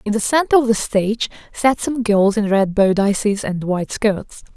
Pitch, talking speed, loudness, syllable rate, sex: 215 Hz, 195 wpm, -18 LUFS, 4.8 syllables/s, female